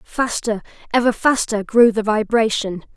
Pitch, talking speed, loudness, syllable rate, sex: 225 Hz, 120 wpm, -18 LUFS, 4.4 syllables/s, female